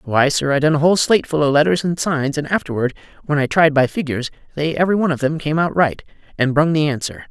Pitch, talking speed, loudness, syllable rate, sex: 150 Hz, 255 wpm, -17 LUFS, 6.7 syllables/s, male